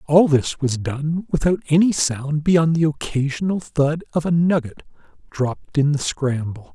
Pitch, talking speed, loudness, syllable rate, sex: 150 Hz, 160 wpm, -20 LUFS, 4.4 syllables/s, male